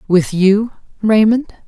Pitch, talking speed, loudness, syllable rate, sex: 210 Hz, 105 wpm, -14 LUFS, 3.3 syllables/s, female